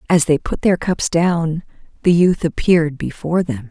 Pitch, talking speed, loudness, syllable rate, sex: 165 Hz, 180 wpm, -17 LUFS, 4.8 syllables/s, female